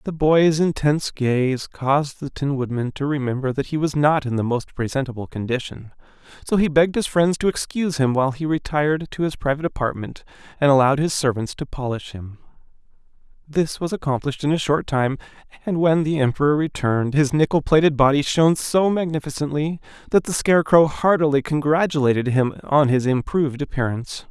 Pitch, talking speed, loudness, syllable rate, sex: 145 Hz, 175 wpm, -20 LUFS, 5.7 syllables/s, male